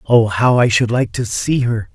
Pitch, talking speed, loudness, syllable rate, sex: 115 Hz, 245 wpm, -15 LUFS, 4.6 syllables/s, male